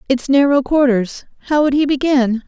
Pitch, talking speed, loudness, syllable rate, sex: 270 Hz, 170 wpm, -15 LUFS, 4.9 syllables/s, female